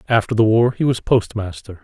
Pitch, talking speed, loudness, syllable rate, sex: 110 Hz, 195 wpm, -17 LUFS, 5.5 syllables/s, male